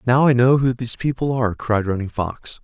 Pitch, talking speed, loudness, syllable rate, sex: 120 Hz, 230 wpm, -19 LUFS, 5.6 syllables/s, male